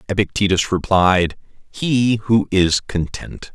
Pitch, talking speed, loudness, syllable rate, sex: 100 Hz, 100 wpm, -18 LUFS, 3.7 syllables/s, male